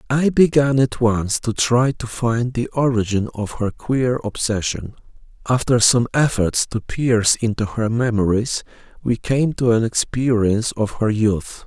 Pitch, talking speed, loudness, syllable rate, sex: 115 Hz, 155 wpm, -19 LUFS, 4.2 syllables/s, male